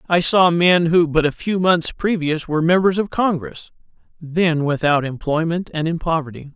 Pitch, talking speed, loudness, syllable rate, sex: 165 Hz, 175 wpm, -18 LUFS, 4.8 syllables/s, male